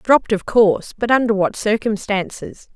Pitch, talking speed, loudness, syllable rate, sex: 215 Hz, 155 wpm, -17 LUFS, 4.9 syllables/s, female